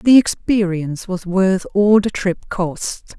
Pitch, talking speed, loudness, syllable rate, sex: 190 Hz, 150 wpm, -18 LUFS, 3.8 syllables/s, female